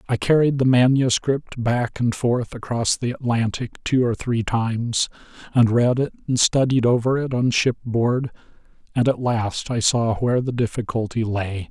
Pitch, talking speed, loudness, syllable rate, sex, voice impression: 120 Hz, 165 wpm, -21 LUFS, 4.5 syllables/s, male, very masculine, slightly old, very thick, relaxed, weak, bright, soft, muffled, fluent, raspy, cool, intellectual, slightly refreshing, sincere, very calm, very mature, very friendly, very reassuring, very unique, elegant, wild, very sweet, lively, kind, strict